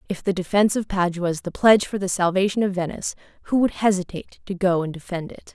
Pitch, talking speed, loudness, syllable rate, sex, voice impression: 190 Hz, 225 wpm, -22 LUFS, 6.6 syllables/s, female, feminine, adult-like, slightly intellectual, slightly calm, slightly sweet